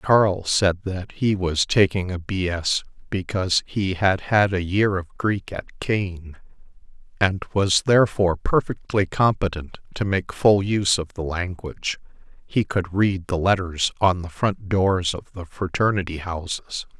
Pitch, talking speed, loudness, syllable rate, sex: 95 Hz, 155 wpm, -22 LUFS, 4.1 syllables/s, male